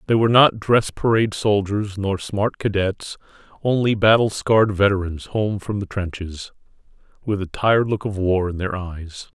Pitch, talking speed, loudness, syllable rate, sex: 100 Hz, 160 wpm, -20 LUFS, 4.8 syllables/s, male